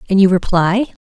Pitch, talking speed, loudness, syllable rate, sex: 195 Hz, 175 wpm, -14 LUFS, 5.6 syllables/s, female